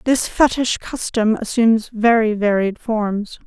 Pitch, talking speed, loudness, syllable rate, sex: 220 Hz, 120 wpm, -18 LUFS, 4.0 syllables/s, female